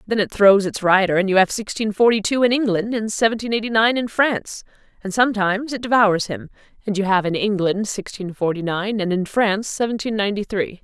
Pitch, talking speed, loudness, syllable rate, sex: 205 Hz, 210 wpm, -19 LUFS, 5.8 syllables/s, female